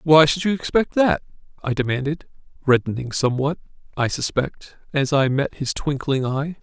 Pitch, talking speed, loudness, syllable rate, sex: 145 Hz, 155 wpm, -21 LUFS, 5.0 syllables/s, male